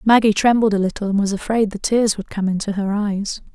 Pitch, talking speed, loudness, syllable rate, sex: 205 Hz, 235 wpm, -19 LUFS, 5.7 syllables/s, female